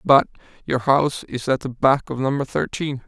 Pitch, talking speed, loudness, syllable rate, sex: 135 Hz, 175 wpm, -21 LUFS, 4.7 syllables/s, male